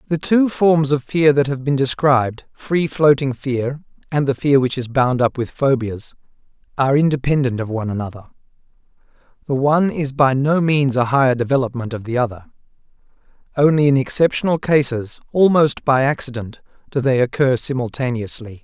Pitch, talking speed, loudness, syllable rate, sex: 135 Hz, 160 wpm, -18 LUFS, 5.3 syllables/s, male